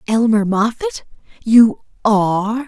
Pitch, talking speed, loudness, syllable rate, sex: 225 Hz, 65 wpm, -15 LUFS, 3.7 syllables/s, female